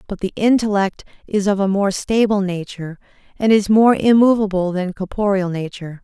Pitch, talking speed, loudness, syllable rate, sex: 200 Hz, 160 wpm, -17 LUFS, 5.3 syllables/s, female